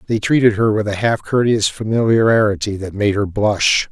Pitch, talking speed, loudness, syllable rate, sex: 105 Hz, 185 wpm, -16 LUFS, 4.8 syllables/s, male